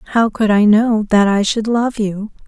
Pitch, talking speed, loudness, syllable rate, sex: 215 Hz, 220 wpm, -15 LUFS, 4.5 syllables/s, female